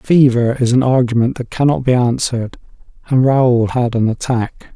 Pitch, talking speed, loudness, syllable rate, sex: 125 Hz, 165 wpm, -15 LUFS, 4.8 syllables/s, male